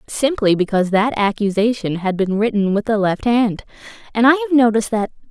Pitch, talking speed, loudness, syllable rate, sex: 220 Hz, 180 wpm, -17 LUFS, 5.7 syllables/s, female